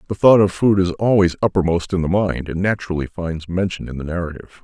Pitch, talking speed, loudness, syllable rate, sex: 90 Hz, 220 wpm, -18 LUFS, 6.5 syllables/s, male